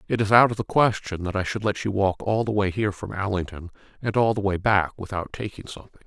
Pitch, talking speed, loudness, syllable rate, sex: 100 Hz, 255 wpm, -23 LUFS, 6.3 syllables/s, male